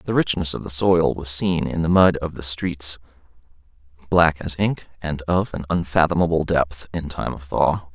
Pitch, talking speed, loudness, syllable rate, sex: 80 Hz, 190 wpm, -21 LUFS, 4.6 syllables/s, male